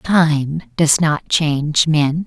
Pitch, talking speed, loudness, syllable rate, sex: 155 Hz, 135 wpm, -16 LUFS, 2.8 syllables/s, female